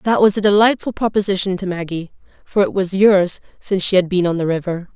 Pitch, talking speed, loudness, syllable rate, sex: 190 Hz, 220 wpm, -17 LUFS, 6.0 syllables/s, female